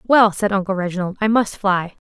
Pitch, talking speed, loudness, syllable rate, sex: 200 Hz, 205 wpm, -19 LUFS, 5.4 syllables/s, female